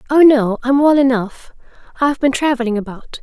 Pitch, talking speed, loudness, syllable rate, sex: 260 Hz, 165 wpm, -15 LUFS, 5.6 syllables/s, female